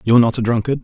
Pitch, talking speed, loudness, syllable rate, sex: 115 Hz, 290 wpm, -16 LUFS, 8.2 syllables/s, male